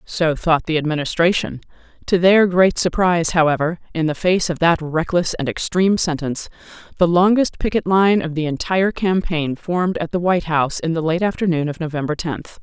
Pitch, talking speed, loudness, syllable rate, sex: 170 Hz, 180 wpm, -18 LUFS, 5.5 syllables/s, female